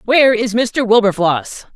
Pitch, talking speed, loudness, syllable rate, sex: 220 Hz, 135 wpm, -14 LUFS, 4.5 syllables/s, female